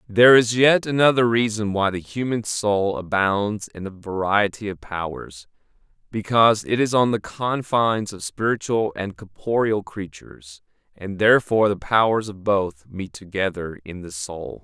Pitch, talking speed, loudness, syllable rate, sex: 105 Hz, 150 wpm, -21 LUFS, 4.6 syllables/s, male